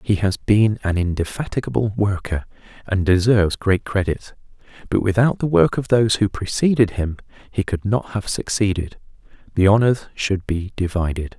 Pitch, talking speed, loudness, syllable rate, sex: 100 Hz, 155 wpm, -20 LUFS, 5.0 syllables/s, male